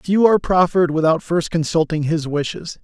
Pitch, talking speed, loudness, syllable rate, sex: 165 Hz, 170 wpm, -18 LUFS, 5.4 syllables/s, male